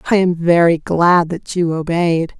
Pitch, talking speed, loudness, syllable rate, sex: 170 Hz, 175 wpm, -15 LUFS, 4.3 syllables/s, female